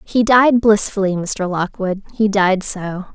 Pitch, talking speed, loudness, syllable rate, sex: 200 Hz, 150 wpm, -16 LUFS, 3.8 syllables/s, female